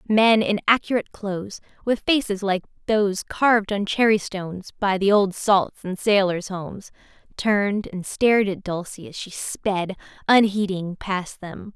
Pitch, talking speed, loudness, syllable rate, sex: 200 Hz, 155 wpm, -22 LUFS, 4.5 syllables/s, female